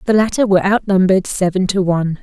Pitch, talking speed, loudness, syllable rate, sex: 190 Hz, 190 wpm, -15 LUFS, 6.8 syllables/s, female